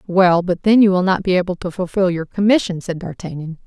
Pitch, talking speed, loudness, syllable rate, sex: 180 Hz, 230 wpm, -17 LUFS, 5.8 syllables/s, female